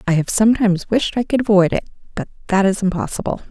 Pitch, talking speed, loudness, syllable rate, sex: 200 Hz, 205 wpm, -17 LUFS, 6.8 syllables/s, female